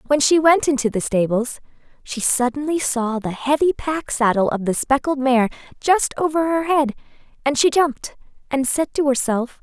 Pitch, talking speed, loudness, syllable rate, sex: 270 Hz, 175 wpm, -19 LUFS, 4.8 syllables/s, female